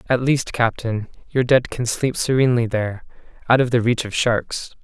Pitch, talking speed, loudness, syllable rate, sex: 120 Hz, 185 wpm, -20 LUFS, 5.0 syllables/s, male